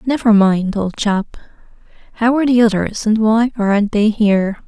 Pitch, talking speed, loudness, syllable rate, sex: 215 Hz, 165 wpm, -15 LUFS, 5.1 syllables/s, female